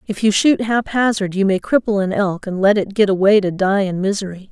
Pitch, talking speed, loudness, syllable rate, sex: 200 Hz, 240 wpm, -17 LUFS, 5.5 syllables/s, female